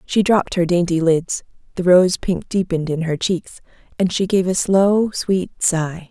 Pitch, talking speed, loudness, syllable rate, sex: 180 Hz, 185 wpm, -18 LUFS, 4.5 syllables/s, female